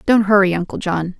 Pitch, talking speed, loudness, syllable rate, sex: 190 Hz, 200 wpm, -16 LUFS, 5.6 syllables/s, female